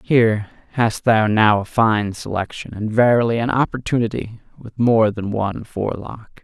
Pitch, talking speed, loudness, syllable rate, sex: 110 Hz, 150 wpm, -19 LUFS, 4.8 syllables/s, male